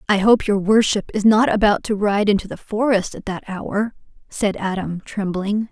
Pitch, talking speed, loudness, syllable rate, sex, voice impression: 205 Hz, 190 wpm, -19 LUFS, 4.7 syllables/s, female, feminine, adult-like, slightly sincere, friendly, slightly elegant, slightly sweet